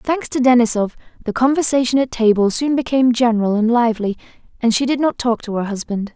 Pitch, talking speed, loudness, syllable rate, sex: 240 Hz, 195 wpm, -17 LUFS, 6.2 syllables/s, female